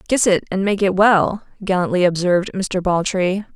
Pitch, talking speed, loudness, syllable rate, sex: 190 Hz, 170 wpm, -18 LUFS, 5.0 syllables/s, female